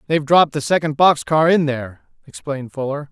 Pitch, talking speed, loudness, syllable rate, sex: 145 Hz, 190 wpm, -17 LUFS, 6.2 syllables/s, male